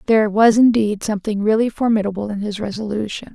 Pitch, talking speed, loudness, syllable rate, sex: 215 Hz, 160 wpm, -18 LUFS, 6.3 syllables/s, female